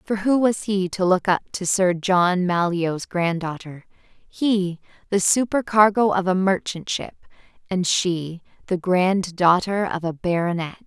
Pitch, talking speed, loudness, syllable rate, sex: 185 Hz, 145 wpm, -21 LUFS, 4.0 syllables/s, female